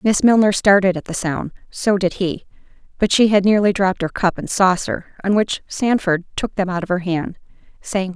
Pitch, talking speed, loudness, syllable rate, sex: 195 Hz, 190 wpm, -18 LUFS, 5.1 syllables/s, female